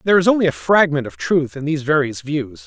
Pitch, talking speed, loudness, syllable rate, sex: 145 Hz, 250 wpm, -18 LUFS, 6.3 syllables/s, male